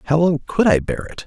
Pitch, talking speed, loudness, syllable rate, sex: 155 Hz, 285 wpm, -18 LUFS, 6.0 syllables/s, male